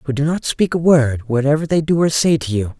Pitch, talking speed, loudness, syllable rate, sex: 145 Hz, 280 wpm, -16 LUFS, 5.6 syllables/s, male